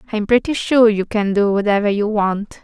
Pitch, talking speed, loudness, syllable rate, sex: 210 Hz, 205 wpm, -16 LUFS, 5.0 syllables/s, female